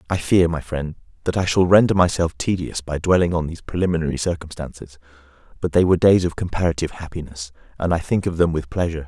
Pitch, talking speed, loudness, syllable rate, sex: 85 Hz, 200 wpm, -20 LUFS, 6.6 syllables/s, male